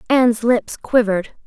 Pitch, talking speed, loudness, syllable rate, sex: 230 Hz, 125 wpm, -17 LUFS, 5.0 syllables/s, female